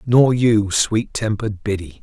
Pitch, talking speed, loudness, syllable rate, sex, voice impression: 105 Hz, 150 wpm, -18 LUFS, 4.2 syllables/s, male, very masculine, slightly old, very thick, tensed, very powerful, slightly dark, soft, slightly muffled, fluent, raspy, cool, intellectual, slightly refreshing, sincere, calm, very mature, friendly, reassuring, very unique, slightly elegant, very wild, sweet, lively, kind, slightly intense